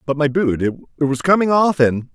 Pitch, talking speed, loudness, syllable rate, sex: 150 Hz, 195 wpm, -17 LUFS, 5.3 syllables/s, male